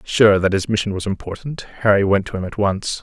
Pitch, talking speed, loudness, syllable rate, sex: 100 Hz, 240 wpm, -19 LUFS, 5.8 syllables/s, male